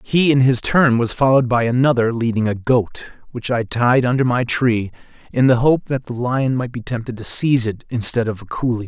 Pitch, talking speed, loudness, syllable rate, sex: 120 Hz, 225 wpm, -17 LUFS, 5.3 syllables/s, male